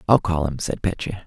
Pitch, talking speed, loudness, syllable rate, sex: 90 Hz, 240 wpm, -23 LUFS, 5.4 syllables/s, male